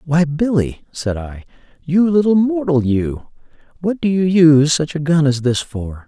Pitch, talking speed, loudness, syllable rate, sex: 155 Hz, 180 wpm, -16 LUFS, 4.4 syllables/s, male